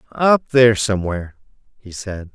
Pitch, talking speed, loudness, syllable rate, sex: 110 Hz, 130 wpm, -17 LUFS, 5.3 syllables/s, male